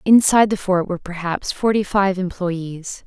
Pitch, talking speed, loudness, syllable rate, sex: 185 Hz, 155 wpm, -19 LUFS, 4.8 syllables/s, female